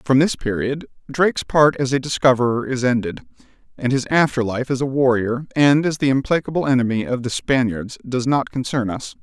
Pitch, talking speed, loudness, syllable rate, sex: 130 Hz, 190 wpm, -19 LUFS, 5.4 syllables/s, male